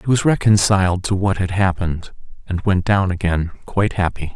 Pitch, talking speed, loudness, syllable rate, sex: 95 Hz, 180 wpm, -18 LUFS, 5.6 syllables/s, male